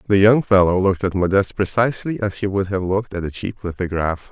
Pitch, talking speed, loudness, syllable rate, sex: 100 Hz, 225 wpm, -19 LUFS, 6.4 syllables/s, male